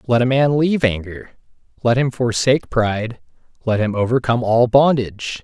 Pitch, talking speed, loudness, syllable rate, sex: 120 Hz, 155 wpm, -17 LUFS, 5.4 syllables/s, male